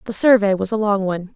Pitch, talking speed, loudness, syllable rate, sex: 205 Hz, 265 wpm, -17 LUFS, 6.7 syllables/s, female